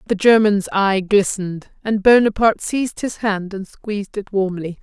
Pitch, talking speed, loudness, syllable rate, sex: 200 Hz, 160 wpm, -18 LUFS, 5.0 syllables/s, female